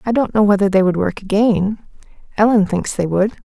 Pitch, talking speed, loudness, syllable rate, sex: 205 Hz, 205 wpm, -16 LUFS, 5.7 syllables/s, female